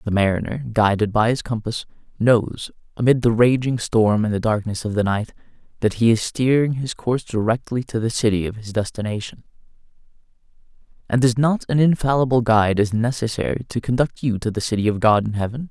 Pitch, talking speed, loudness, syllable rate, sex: 115 Hz, 185 wpm, -20 LUFS, 5.7 syllables/s, male